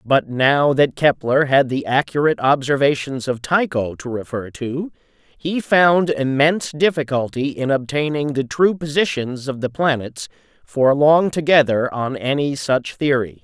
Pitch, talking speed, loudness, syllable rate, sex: 140 Hz, 145 wpm, -18 LUFS, 4.3 syllables/s, male